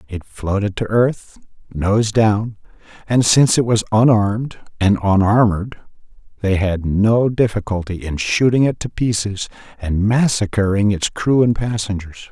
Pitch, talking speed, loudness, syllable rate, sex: 105 Hz, 135 wpm, -17 LUFS, 4.4 syllables/s, male